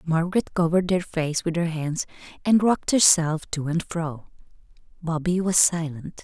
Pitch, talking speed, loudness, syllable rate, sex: 165 Hz, 155 wpm, -23 LUFS, 4.9 syllables/s, female